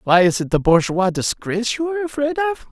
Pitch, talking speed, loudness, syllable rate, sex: 210 Hz, 220 wpm, -19 LUFS, 6.2 syllables/s, male